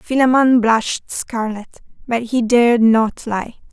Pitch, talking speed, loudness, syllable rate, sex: 235 Hz, 130 wpm, -16 LUFS, 4.2 syllables/s, female